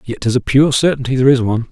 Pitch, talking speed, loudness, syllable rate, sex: 125 Hz, 280 wpm, -14 LUFS, 7.5 syllables/s, male